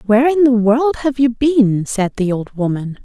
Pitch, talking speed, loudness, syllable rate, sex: 235 Hz, 215 wpm, -15 LUFS, 4.6 syllables/s, female